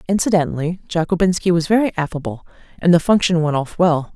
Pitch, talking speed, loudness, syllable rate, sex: 170 Hz, 160 wpm, -18 LUFS, 6.2 syllables/s, female